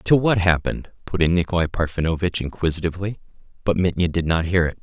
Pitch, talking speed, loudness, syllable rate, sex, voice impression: 85 Hz, 175 wpm, -21 LUFS, 6.5 syllables/s, male, very masculine, very adult-like, very thick, slightly relaxed, very powerful, slightly bright, very soft, slightly muffled, fluent, slightly raspy, very cool, very intellectual, slightly refreshing, very sincere, very calm, mature, friendly, very reassuring, very unique, elegant, wild, very sweet, lively, kind, slightly modest